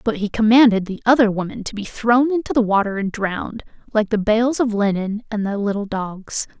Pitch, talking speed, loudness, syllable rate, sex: 215 Hz, 210 wpm, -19 LUFS, 5.3 syllables/s, female